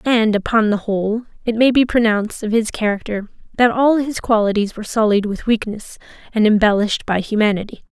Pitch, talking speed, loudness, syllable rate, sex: 220 Hz, 175 wpm, -17 LUFS, 5.8 syllables/s, female